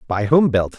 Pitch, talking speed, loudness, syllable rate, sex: 120 Hz, 230 wpm, -16 LUFS, 4.8 syllables/s, male